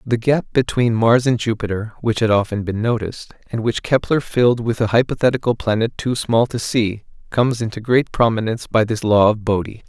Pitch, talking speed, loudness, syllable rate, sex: 115 Hz, 195 wpm, -18 LUFS, 5.4 syllables/s, male